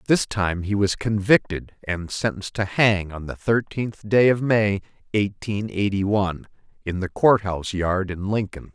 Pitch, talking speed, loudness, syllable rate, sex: 100 Hz, 170 wpm, -22 LUFS, 4.5 syllables/s, male